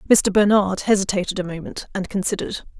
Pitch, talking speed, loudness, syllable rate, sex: 195 Hz, 150 wpm, -20 LUFS, 6.2 syllables/s, female